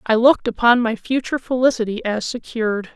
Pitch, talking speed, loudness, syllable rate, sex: 235 Hz, 160 wpm, -19 LUFS, 6.1 syllables/s, female